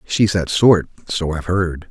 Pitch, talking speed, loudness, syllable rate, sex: 90 Hz, 155 wpm, -17 LUFS, 4.5 syllables/s, male